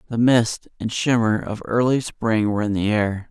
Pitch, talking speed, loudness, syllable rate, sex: 110 Hz, 200 wpm, -21 LUFS, 4.7 syllables/s, male